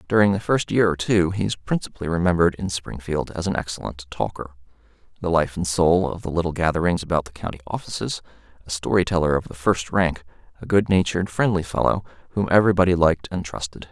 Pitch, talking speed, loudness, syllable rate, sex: 85 Hz, 190 wpm, -22 LUFS, 6.4 syllables/s, male